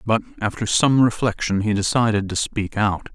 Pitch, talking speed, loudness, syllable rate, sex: 105 Hz, 170 wpm, -20 LUFS, 4.9 syllables/s, male